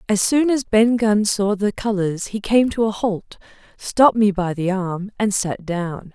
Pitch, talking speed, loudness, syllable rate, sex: 205 Hz, 205 wpm, -19 LUFS, 4.2 syllables/s, female